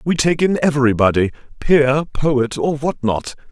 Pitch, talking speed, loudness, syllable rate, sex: 140 Hz, 135 wpm, -17 LUFS, 4.5 syllables/s, male